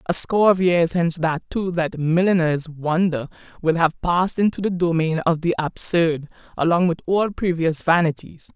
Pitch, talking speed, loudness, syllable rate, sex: 170 Hz, 170 wpm, -20 LUFS, 4.8 syllables/s, female